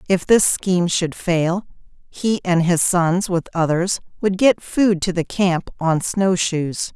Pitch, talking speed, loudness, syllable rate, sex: 180 Hz, 165 wpm, -19 LUFS, 3.7 syllables/s, female